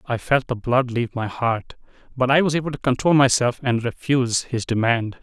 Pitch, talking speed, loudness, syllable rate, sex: 125 Hz, 205 wpm, -21 LUFS, 5.3 syllables/s, male